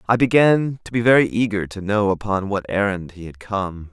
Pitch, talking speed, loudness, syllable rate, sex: 105 Hz, 215 wpm, -19 LUFS, 5.2 syllables/s, male